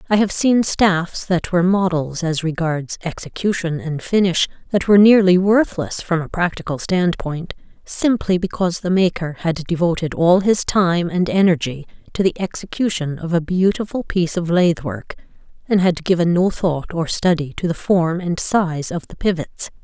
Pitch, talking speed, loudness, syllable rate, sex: 175 Hz, 170 wpm, -18 LUFS, 4.8 syllables/s, female